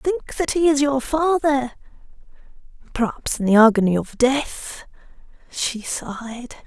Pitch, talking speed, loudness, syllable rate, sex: 265 Hz, 125 wpm, -20 LUFS, 4.0 syllables/s, female